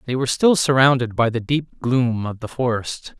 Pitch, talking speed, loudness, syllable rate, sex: 125 Hz, 205 wpm, -19 LUFS, 4.9 syllables/s, male